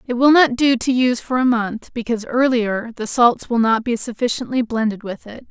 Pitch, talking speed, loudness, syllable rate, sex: 240 Hz, 220 wpm, -18 LUFS, 5.3 syllables/s, female